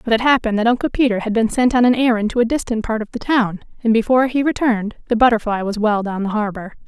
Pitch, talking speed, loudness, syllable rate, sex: 225 Hz, 260 wpm, -17 LUFS, 6.7 syllables/s, female